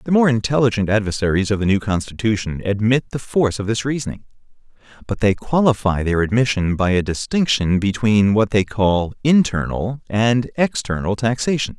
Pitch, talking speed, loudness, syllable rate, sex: 110 Hz, 155 wpm, -18 LUFS, 5.3 syllables/s, male